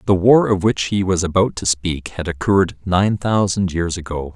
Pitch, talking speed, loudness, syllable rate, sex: 90 Hz, 205 wpm, -18 LUFS, 4.9 syllables/s, male